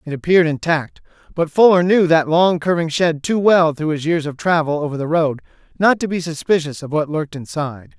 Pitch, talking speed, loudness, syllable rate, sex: 160 Hz, 210 wpm, -17 LUFS, 5.6 syllables/s, male